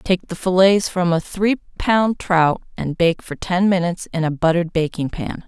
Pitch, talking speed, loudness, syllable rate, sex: 180 Hz, 195 wpm, -19 LUFS, 4.6 syllables/s, female